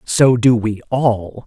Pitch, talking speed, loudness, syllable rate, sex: 115 Hz, 165 wpm, -16 LUFS, 3.2 syllables/s, female